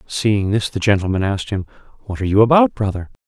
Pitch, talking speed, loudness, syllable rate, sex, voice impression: 105 Hz, 200 wpm, -17 LUFS, 6.6 syllables/s, male, masculine, very adult-like, slightly muffled, fluent, slightly mature, elegant, slightly sweet